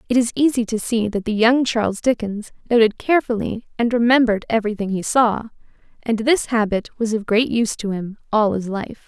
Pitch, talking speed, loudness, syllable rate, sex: 225 Hz, 190 wpm, -19 LUFS, 5.7 syllables/s, female